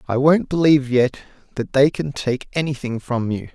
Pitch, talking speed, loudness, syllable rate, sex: 135 Hz, 185 wpm, -19 LUFS, 5.2 syllables/s, male